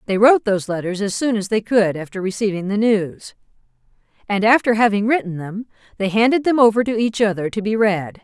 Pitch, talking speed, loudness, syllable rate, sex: 210 Hz, 205 wpm, -18 LUFS, 5.8 syllables/s, female